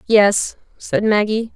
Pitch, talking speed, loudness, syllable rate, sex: 210 Hz, 115 wpm, -17 LUFS, 3.3 syllables/s, female